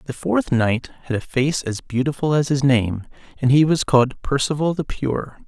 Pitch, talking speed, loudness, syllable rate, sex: 135 Hz, 195 wpm, -20 LUFS, 4.8 syllables/s, male